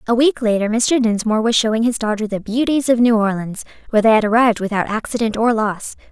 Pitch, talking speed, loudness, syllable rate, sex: 225 Hz, 215 wpm, -17 LUFS, 6.3 syllables/s, female